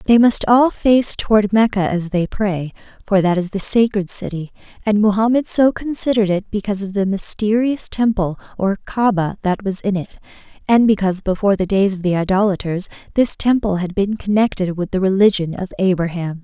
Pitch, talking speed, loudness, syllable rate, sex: 200 Hz, 180 wpm, -17 LUFS, 5.5 syllables/s, female